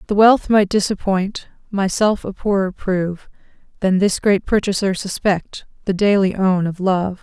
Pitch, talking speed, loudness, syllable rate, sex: 195 Hz, 150 wpm, -18 LUFS, 4.4 syllables/s, female